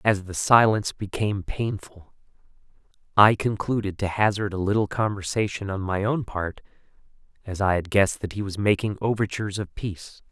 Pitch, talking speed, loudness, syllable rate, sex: 100 Hz, 155 wpm, -24 LUFS, 5.5 syllables/s, male